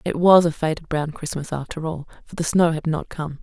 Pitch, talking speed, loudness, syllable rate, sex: 160 Hz, 245 wpm, -21 LUFS, 5.4 syllables/s, female